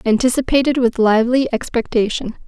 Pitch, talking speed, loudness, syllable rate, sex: 240 Hz, 95 wpm, -17 LUFS, 5.8 syllables/s, female